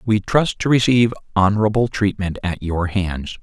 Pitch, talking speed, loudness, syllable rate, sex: 105 Hz, 160 wpm, -18 LUFS, 5.0 syllables/s, male